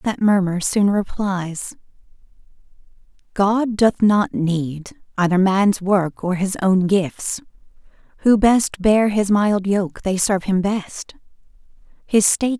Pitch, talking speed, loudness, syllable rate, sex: 200 Hz, 130 wpm, -18 LUFS, 3.5 syllables/s, female